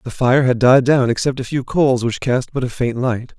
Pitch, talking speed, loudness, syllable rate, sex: 125 Hz, 265 wpm, -17 LUFS, 5.3 syllables/s, male